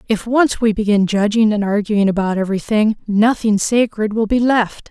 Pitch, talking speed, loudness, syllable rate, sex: 215 Hz, 170 wpm, -16 LUFS, 5.0 syllables/s, female